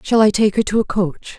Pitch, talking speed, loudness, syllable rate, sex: 205 Hz, 305 wpm, -17 LUFS, 5.4 syllables/s, female